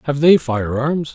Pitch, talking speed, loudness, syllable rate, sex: 135 Hz, 210 wpm, -16 LUFS, 4.0 syllables/s, male